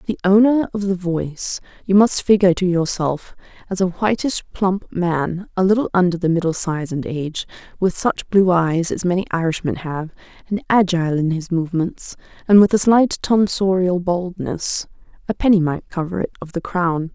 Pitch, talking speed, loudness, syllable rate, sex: 180 Hz, 170 wpm, -19 LUFS, 5.0 syllables/s, female